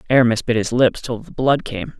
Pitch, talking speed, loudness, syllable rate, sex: 125 Hz, 240 wpm, -19 LUFS, 5.6 syllables/s, male